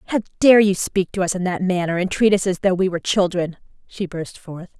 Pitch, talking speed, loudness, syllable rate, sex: 185 Hz, 250 wpm, -19 LUFS, 5.8 syllables/s, female